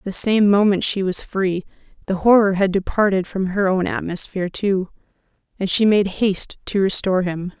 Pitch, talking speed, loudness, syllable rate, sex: 195 Hz, 175 wpm, -19 LUFS, 5.1 syllables/s, female